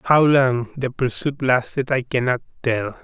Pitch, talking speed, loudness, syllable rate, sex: 130 Hz, 160 wpm, -20 LUFS, 4.0 syllables/s, male